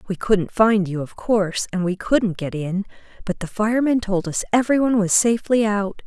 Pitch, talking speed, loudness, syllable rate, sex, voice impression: 205 Hz, 190 wpm, -20 LUFS, 5.4 syllables/s, female, feminine, adult-like, bright, soft, fluent, intellectual, calm, friendly, reassuring, elegant, lively, kind